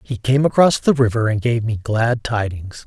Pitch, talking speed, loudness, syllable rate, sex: 115 Hz, 210 wpm, -18 LUFS, 4.8 syllables/s, male